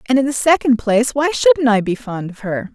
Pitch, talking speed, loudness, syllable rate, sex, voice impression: 240 Hz, 260 wpm, -16 LUFS, 5.3 syllables/s, female, feminine, adult-like, slightly clear, slightly sincere, friendly, slightly elegant